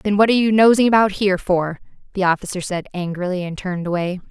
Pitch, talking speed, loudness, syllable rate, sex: 190 Hz, 210 wpm, -18 LUFS, 6.6 syllables/s, female